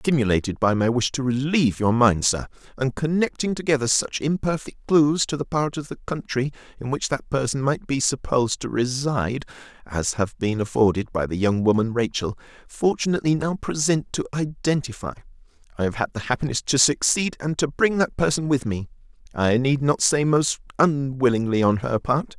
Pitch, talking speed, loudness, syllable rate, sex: 130 Hz, 175 wpm, -22 LUFS, 5.3 syllables/s, male